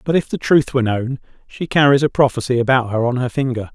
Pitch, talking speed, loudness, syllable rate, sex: 130 Hz, 240 wpm, -17 LUFS, 6.2 syllables/s, male